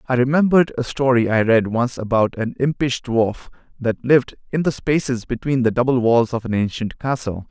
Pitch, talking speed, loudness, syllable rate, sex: 125 Hz, 190 wpm, -19 LUFS, 5.3 syllables/s, male